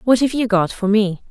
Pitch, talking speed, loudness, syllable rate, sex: 220 Hz, 275 wpm, -17 LUFS, 5.4 syllables/s, female